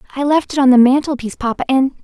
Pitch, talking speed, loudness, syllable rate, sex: 265 Hz, 235 wpm, -14 LUFS, 7.6 syllables/s, female